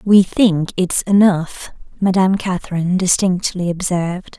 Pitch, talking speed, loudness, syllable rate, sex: 185 Hz, 110 wpm, -16 LUFS, 4.6 syllables/s, female